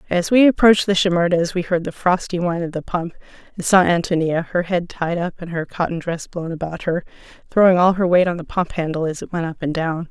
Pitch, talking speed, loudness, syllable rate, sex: 175 Hz, 245 wpm, -19 LUFS, 5.9 syllables/s, female